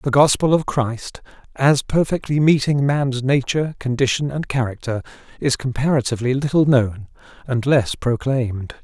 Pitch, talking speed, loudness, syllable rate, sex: 130 Hz, 130 wpm, -19 LUFS, 4.8 syllables/s, male